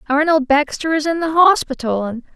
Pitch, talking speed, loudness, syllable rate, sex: 295 Hz, 180 wpm, -16 LUFS, 5.3 syllables/s, female